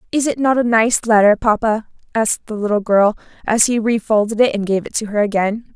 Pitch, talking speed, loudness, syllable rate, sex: 220 Hz, 210 wpm, -16 LUFS, 5.5 syllables/s, female